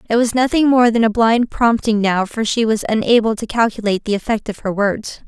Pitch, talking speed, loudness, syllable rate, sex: 220 Hz, 230 wpm, -16 LUFS, 5.6 syllables/s, female